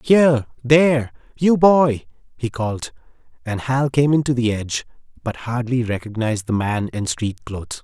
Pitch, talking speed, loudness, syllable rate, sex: 125 Hz, 160 wpm, -19 LUFS, 5.0 syllables/s, male